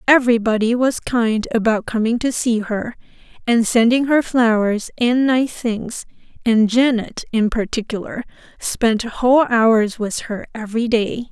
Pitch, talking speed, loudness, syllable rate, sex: 230 Hz, 140 wpm, -18 LUFS, 4.3 syllables/s, female